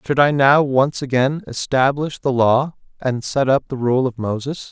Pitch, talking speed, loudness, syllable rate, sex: 135 Hz, 190 wpm, -18 LUFS, 4.4 syllables/s, male